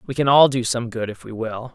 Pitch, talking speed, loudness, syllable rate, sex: 120 Hz, 310 wpm, -20 LUFS, 5.6 syllables/s, male